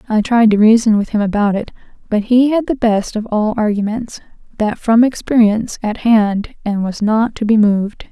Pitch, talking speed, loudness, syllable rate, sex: 220 Hz, 200 wpm, -15 LUFS, 5.0 syllables/s, female